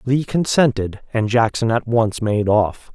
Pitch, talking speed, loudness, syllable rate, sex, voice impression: 115 Hz, 165 wpm, -18 LUFS, 4.0 syllables/s, male, masculine, adult-like, tensed, powerful, slightly bright, slightly muffled, raspy, cool, intellectual, calm, slightly friendly, wild, lively